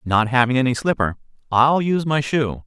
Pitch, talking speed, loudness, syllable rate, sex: 130 Hz, 180 wpm, -19 LUFS, 5.4 syllables/s, male